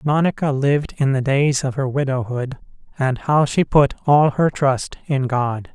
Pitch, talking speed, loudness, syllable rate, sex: 135 Hz, 175 wpm, -19 LUFS, 4.4 syllables/s, male